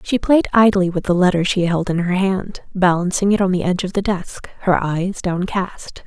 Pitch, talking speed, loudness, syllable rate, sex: 185 Hz, 220 wpm, -18 LUFS, 5.0 syllables/s, female